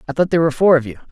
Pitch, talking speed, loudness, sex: 155 Hz, 375 wpm, -15 LUFS, male